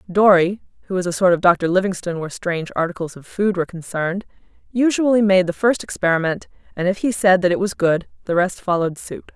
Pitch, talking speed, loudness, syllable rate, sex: 185 Hz, 205 wpm, -19 LUFS, 6.3 syllables/s, female